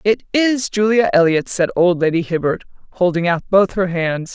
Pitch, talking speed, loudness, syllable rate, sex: 185 Hz, 180 wpm, -16 LUFS, 4.8 syllables/s, female